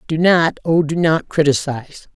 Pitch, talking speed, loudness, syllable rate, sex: 160 Hz, 110 wpm, -16 LUFS, 4.7 syllables/s, female